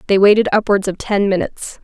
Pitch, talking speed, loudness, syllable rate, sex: 200 Hz, 195 wpm, -15 LUFS, 6.3 syllables/s, female